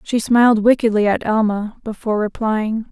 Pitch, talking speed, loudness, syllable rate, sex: 220 Hz, 145 wpm, -17 LUFS, 5.2 syllables/s, female